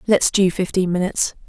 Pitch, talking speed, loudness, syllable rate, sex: 185 Hz, 160 wpm, -19 LUFS, 5.7 syllables/s, female